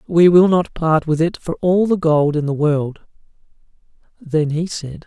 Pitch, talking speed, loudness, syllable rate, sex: 165 Hz, 190 wpm, -17 LUFS, 4.2 syllables/s, male